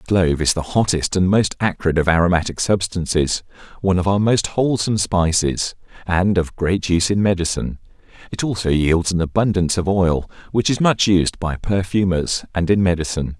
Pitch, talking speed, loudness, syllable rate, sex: 90 Hz, 175 wpm, -19 LUFS, 5.5 syllables/s, male